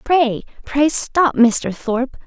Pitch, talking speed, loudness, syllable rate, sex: 260 Hz, 135 wpm, -17 LUFS, 3.2 syllables/s, female